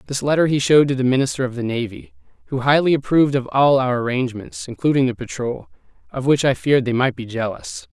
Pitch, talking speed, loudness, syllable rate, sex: 130 Hz, 210 wpm, -19 LUFS, 6.4 syllables/s, male